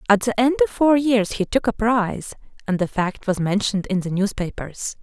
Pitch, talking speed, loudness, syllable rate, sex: 215 Hz, 215 wpm, -21 LUFS, 5.2 syllables/s, female